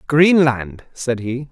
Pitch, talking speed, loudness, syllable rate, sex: 135 Hz, 120 wpm, -17 LUFS, 3.1 syllables/s, male